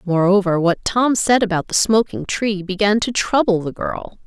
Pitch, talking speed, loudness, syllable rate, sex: 200 Hz, 185 wpm, -18 LUFS, 4.7 syllables/s, female